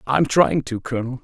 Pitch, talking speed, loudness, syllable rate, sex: 130 Hz, 195 wpm, -20 LUFS, 5.5 syllables/s, male